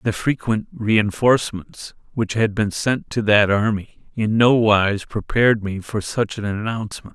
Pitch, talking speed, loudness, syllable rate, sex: 110 Hz, 150 wpm, -19 LUFS, 4.4 syllables/s, male